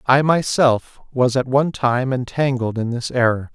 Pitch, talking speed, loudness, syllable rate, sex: 125 Hz, 170 wpm, -19 LUFS, 4.5 syllables/s, male